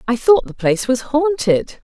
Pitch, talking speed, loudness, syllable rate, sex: 260 Hz, 190 wpm, -17 LUFS, 4.7 syllables/s, female